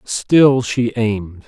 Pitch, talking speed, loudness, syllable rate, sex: 115 Hz, 120 wpm, -16 LUFS, 3.0 syllables/s, male